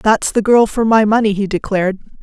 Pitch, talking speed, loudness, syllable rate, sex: 210 Hz, 215 wpm, -14 LUFS, 5.7 syllables/s, female